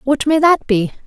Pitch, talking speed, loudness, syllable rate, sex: 270 Hz, 225 wpm, -14 LUFS, 4.8 syllables/s, female